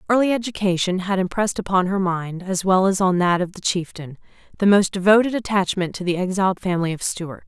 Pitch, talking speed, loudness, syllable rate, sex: 190 Hz, 200 wpm, -20 LUFS, 6.0 syllables/s, female